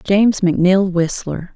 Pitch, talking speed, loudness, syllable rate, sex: 185 Hz, 115 wpm, -16 LUFS, 4.8 syllables/s, female